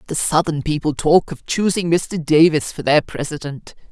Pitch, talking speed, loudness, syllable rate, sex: 155 Hz, 170 wpm, -18 LUFS, 4.7 syllables/s, female